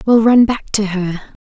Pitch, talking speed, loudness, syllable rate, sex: 210 Hz, 210 wpm, -14 LUFS, 4.2 syllables/s, female